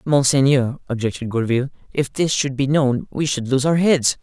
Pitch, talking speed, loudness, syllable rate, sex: 135 Hz, 185 wpm, -19 LUFS, 5.1 syllables/s, male